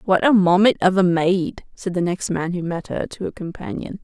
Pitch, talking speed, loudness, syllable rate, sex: 185 Hz, 240 wpm, -20 LUFS, 5.0 syllables/s, female